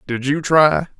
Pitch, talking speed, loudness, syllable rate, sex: 140 Hz, 180 wpm, -16 LUFS, 3.9 syllables/s, male